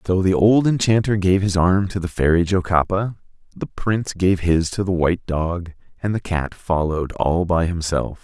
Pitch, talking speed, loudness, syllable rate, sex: 90 Hz, 190 wpm, -20 LUFS, 4.9 syllables/s, male